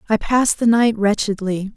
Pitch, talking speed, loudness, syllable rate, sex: 215 Hz, 170 wpm, -17 LUFS, 5.2 syllables/s, female